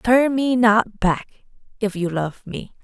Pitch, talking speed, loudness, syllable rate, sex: 215 Hz, 170 wpm, -20 LUFS, 3.4 syllables/s, female